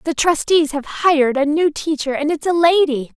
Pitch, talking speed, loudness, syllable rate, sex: 305 Hz, 205 wpm, -17 LUFS, 5.0 syllables/s, female